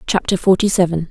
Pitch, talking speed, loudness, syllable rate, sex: 185 Hz, 160 wpm, -16 LUFS, 6.2 syllables/s, female